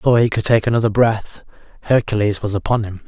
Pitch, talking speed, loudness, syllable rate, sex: 110 Hz, 195 wpm, -17 LUFS, 6.6 syllables/s, male